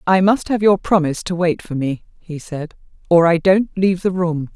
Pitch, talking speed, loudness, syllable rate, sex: 175 Hz, 225 wpm, -17 LUFS, 5.1 syllables/s, female